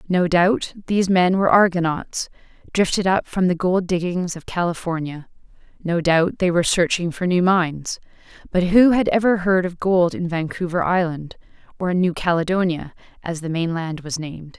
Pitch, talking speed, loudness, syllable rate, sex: 175 Hz, 170 wpm, -20 LUFS, 5.1 syllables/s, female